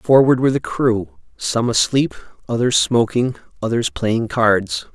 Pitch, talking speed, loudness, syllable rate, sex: 120 Hz, 135 wpm, -18 LUFS, 4.3 syllables/s, male